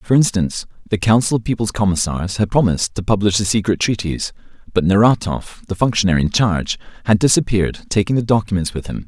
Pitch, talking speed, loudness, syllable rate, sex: 100 Hz, 180 wpm, -17 LUFS, 6.4 syllables/s, male